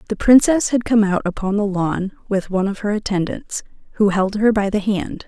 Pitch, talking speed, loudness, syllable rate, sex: 205 Hz, 215 wpm, -18 LUFS, 5.3 syllables/s, female